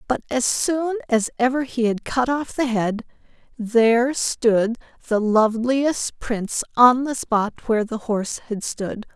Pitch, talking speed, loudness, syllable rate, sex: 240 Hz, 155 wpm, -21 LUFS, 4.1 syllables/s, female